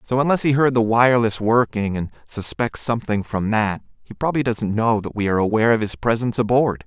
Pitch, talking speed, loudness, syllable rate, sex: 115 Hz, 210 wpm, -20 LUFS, 6.2 syllables/s, male